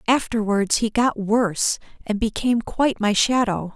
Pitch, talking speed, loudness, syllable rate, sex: 220 Hz, 145 wpm, -21 LUFS, 4.8 syllables/s, female